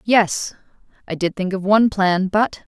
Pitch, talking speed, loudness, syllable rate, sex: 195 Hz, 130 wpm, -19 LUFS, 4.7 syllables/s, female